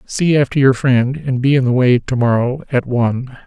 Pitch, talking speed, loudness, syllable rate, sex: 130 Hz, 225 wpm, -15 LUFS, 5.2 syllables/s, male